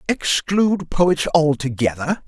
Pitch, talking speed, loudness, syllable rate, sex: 160 Hz, 80 wpm, -19 LUFS, 4.0 syllables/s, male